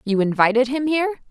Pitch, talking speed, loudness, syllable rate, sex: 255 Hz, 185 wpm, -19 LUFS, 6.7 syllables/s, female